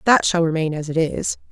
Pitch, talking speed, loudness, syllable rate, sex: 165 Hz, 240 wpm, -20 LUFS, 5.4 syllables/s, female